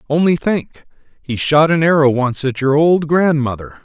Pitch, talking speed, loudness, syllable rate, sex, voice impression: 145 Hz, 170 wpm, -15 LUFS, 4.6 syllables/s, male, very masculine, very adult-like, old, very thick, slightly tensed, very powerful, bright, soft, clear, fluent, slightly raspy, very cool, very intellectual, slightly refreshing, sincere, very calm, very mature, very friendly, very reassuring, very unique, elegant, very wild, sweet, kind, slightly intense